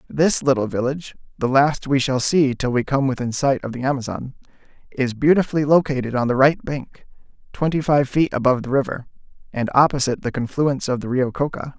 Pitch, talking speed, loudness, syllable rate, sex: 135 Hz, 190 wpm, -20 LUFS, 5.9 syllables/s, male